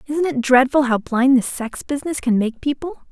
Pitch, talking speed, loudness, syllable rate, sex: 265 Hz, 210 wpm, -19 LUFS, 5.2 syllables/s, female